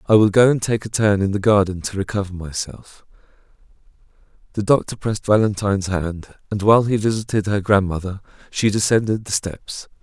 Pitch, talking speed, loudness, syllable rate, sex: 100 Hz, 170 wpm, -19 LUFS, 5.6 syllables/s, male